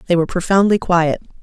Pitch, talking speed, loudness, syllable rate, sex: 175 Hz, 170 wpm, -16 LUFS, 6.6 syllables/s, female